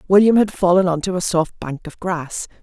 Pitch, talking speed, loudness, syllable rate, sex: 180 Hz, 230 wpm, -18 LUFS, 5.1 syllables/s, female